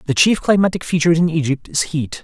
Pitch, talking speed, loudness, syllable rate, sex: 160 Hz, 215 wpm, -17 LUFS, 6.3 syllables/s, male